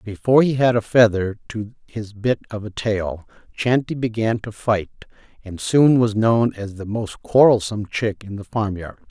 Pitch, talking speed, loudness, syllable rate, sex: 110 Hz, 185 wpm, -20 LUFS, 4.7 syllables/s, male